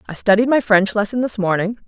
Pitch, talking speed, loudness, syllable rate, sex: 215 Hz, 225 wpm, -17 LUFS, 5.9 syllables/s, female